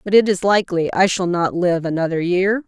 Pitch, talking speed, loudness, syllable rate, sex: 185 Hz, 225 wpm, -18 LUFS, 5.5 syllables/s, female